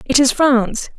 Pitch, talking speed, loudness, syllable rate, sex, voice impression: 265 Hz, 185 wpm, -15 LUFS, 4.9 syllables/s, female, feminine, adult-like, powerful, soft, slightly raspy, calm, friendly, reassuring, elegant, kind, modest